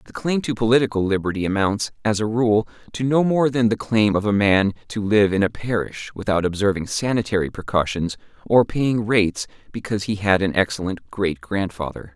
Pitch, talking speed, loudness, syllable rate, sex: 105 Hz, 185 wpm, -21 LUFS, 5.4 syllables/s, male